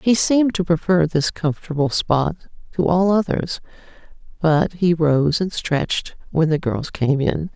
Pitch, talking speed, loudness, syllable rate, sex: 165 Hz, 160 wpm, -19 LUFS, 4.4 syllables/s, female